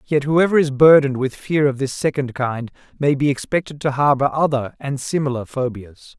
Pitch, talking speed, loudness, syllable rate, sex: 140 Hz, 185 wpm, -18 LUFS, 5.2 syllables/s, male